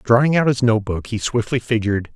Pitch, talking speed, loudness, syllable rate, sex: 115 Hz, 225 wpm, -19 LUFS, 5.9 syllables/s, male